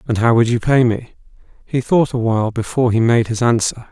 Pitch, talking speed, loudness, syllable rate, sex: 120 Hz, 230 wpm, -16 LUFS, 5.8 syllables/s, male